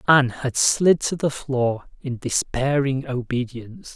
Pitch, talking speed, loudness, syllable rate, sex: 130 Hz, 135 wpm, -22 LUFS, 4.2 syllables/s, male